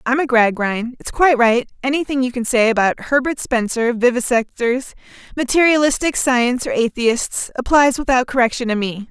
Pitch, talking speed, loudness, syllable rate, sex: 250 Hz, 140 wpm, -17 LUFS, 5.3 syllables/s, female